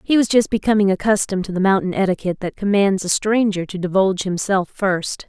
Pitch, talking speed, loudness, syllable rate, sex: 195 Hz, 195 wpm, -18 LUFS, 6.0 syllables/s, female